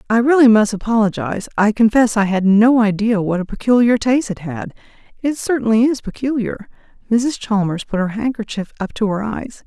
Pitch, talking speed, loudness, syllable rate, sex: 220 Hz, 180 wpm, -17 LUFS, 5.4 syllables/s, female